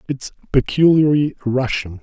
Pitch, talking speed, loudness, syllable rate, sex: 135 Hz, 90 wpm, -17 LUFS, 4.5 syllables/s, male